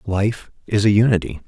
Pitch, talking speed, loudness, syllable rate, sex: 105 Hz, 165 wpm, -18 LUFS, 5.1 syllables/s, male